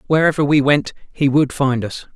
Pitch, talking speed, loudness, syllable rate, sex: 140 Hz, 195 wpm, -17 LUFS, 5.1 syllables/s, male